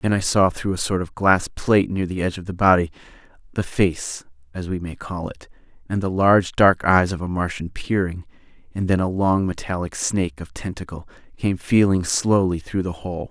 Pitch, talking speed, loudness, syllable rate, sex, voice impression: 90 Hz, 205 wpm, -21 LUFS, 5.2 syllables/s, male, very masculine, very adult-like, very middle-aged, very thick, tensed, very powerful, slightly bright, soft, clear, fluent, very cool, very intellectual, refreshing, very sincere, very calm, mature, very friendly, very reassuring, unique, very elegant, wild, very sweet, lively, very kind, slightly intense